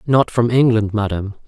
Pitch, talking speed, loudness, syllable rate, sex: 110 Hz, 160 wpm, -17 LUFS, 5.6 syllables/s, male